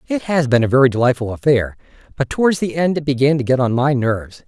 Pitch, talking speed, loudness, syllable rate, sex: 135 Hz, 240 wpm, -17 LUFS, 6.4 syllables/s, male